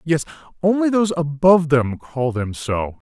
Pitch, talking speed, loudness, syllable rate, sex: 155 Hz, 155 wpm, -19 LUFS, 4.8 syllables/s, male